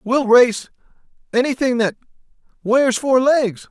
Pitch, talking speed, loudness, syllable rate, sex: 245 Hz, 80 wpm, -16 LUFS, 3.8 syllables/s, male